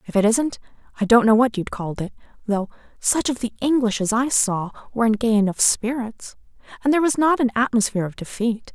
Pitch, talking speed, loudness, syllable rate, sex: 230 Hz, 215 wpm, -20 LUFS, 5.9 syllables/s, female